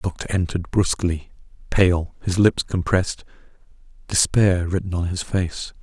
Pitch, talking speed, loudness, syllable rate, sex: 90 Hz, 135 wpm, -21 LUFS, 5.0 syllables/s, male